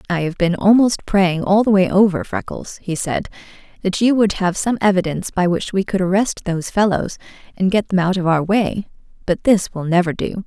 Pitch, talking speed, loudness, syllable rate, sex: 190 Hz, 210 wpm, -18 LUFS, 5.3 syllables/s, female